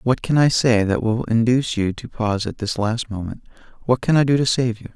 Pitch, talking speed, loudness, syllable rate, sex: 115 Hz, 255 wpm, -20 LUFS, 5.7 syllables/s, male